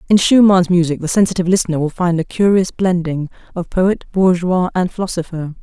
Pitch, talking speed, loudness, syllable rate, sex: 180 Hz, 170 wpm, -15 LUFS, 5.8 syllables/s, female